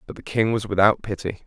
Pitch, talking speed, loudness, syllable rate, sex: 105 Hz, 245 wpm, -22 LUFS, 6.1 syllables/s, male